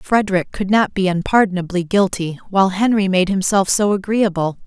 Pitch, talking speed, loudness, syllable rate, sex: 190 Hz, 155 wpm, -17 LUFS, 5.4 syllables/s, female